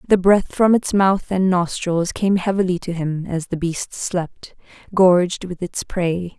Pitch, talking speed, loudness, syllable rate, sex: 180 Hz, 180 wpm, -19 LUFS, 4.0 syllables/s, female